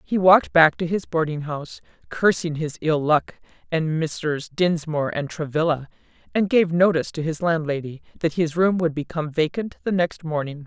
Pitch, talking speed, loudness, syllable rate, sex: 160 Hz, 175 wpm, -22 LUFS, 5.1 syllables/s, female